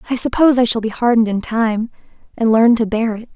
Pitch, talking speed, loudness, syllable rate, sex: 230 Hz, 235 wpm, -16 LUFS, 6.4 syllables/s, female